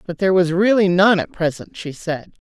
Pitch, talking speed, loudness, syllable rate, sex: 180 Hz, 220 wpm, -18 LUFS, 5.4 syllables/s, female